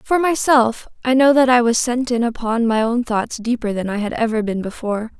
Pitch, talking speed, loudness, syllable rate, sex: 235 Hz, 230 wpm, -18 LUFS, 5.3 syllables/s, female